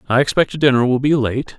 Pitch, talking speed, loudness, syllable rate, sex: 130 Hz, 225 wpm, -16 LUFS, 5.8 syllables/s, male